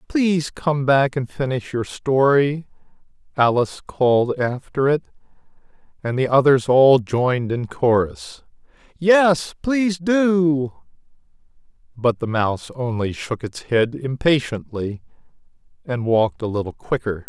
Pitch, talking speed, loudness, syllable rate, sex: 135 Hz, 120 wpm, -20 LUFS, 4.1 syllables/s, male